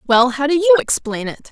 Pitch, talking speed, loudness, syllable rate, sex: 280 Hz, 235 wpm, -16 LUFS, 5.2 syllables/s, female